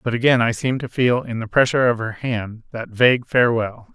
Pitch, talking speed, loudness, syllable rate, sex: 120 Hz, 230 wpm, -19 LUFS, 6.0 syllables/s, male